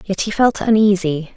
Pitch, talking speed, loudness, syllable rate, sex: 200 Hz, 175 wpm, -16 LUFS, 4.8 syllables/s, female